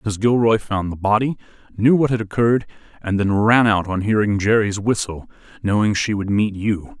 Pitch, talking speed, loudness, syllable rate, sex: 105 Hz, 190 wpm, -19 LUFS, 5.1 syllables/s, male